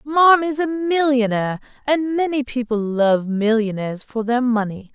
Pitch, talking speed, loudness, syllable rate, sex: 250 Hz, 135 wpm, -19 LUFS, 4.6 syllables/s, female